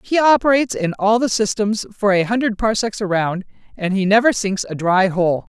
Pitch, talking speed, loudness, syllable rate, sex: 210 Hz, 195 wpm, -17 LUFS, 5.2 syllables/s, female